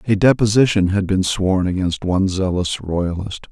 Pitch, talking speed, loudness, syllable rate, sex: 95 Hz, 155 wpm, -18 LUFS, 4.8 syllables/s, male